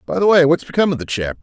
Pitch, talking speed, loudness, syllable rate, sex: 150 Hz, 335 wpm, -16 LUFS, 7.8 syllables/s, male